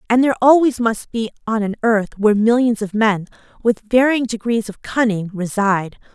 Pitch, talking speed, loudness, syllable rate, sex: 225 Hz, 175 wpm, -17 LUFS, 5.3 syllables/s, female